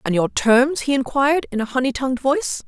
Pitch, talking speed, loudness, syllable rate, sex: 265 Hz, 225 wpm, -19 LUFS, 6.0 syllables/s, female